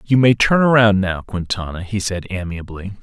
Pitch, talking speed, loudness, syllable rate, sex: 100 Hz, 180 wpm, -17 LUFS, 5.0 syllables/s, male